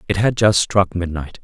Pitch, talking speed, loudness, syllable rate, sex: 95 Hz, 210 wpm, -17 LUFS, 4.8 syllables/s, male